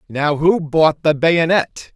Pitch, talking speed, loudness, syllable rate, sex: 160 Hz, 155 wpm, -16 LUFS, 3.4 syllables/s, male